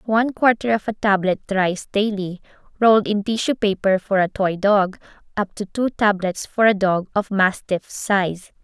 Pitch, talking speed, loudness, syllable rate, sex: 205 Hz, 175 wpm, -20 LUFS, 4.7 syllables/s, female